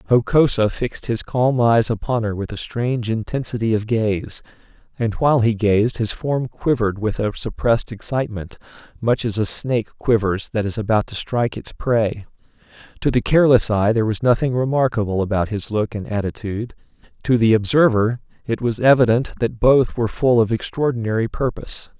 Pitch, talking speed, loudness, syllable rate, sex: 115 Hz, 170 wpm, -19 LUFS, 5.4 syllables/s, male